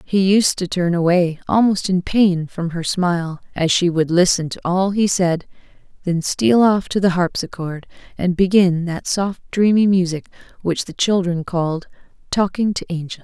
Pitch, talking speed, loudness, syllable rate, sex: 180 Hz, 170 wpm, -18 LUFS, 4.6 syllables/s, female